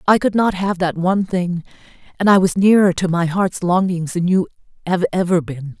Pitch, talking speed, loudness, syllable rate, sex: 180 Hz, 205 wpm, -17 LUFS, 5.2 syllables/s, female